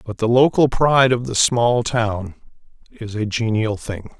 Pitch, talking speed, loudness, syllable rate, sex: 115 Hz, 170 wpm, -18 LUFS, 4.4 syllables/s, male